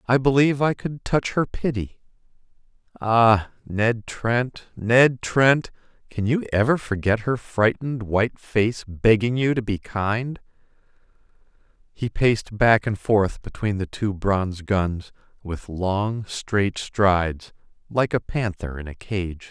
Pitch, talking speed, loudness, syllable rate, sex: 110 Hz, 135 wpm, -22 LUFS, 3.8 syllables/s, male